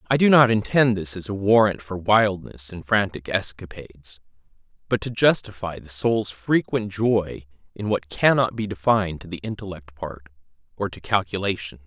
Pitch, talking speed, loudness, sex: 100 Hz, 155 wpm, -22 LUFS, male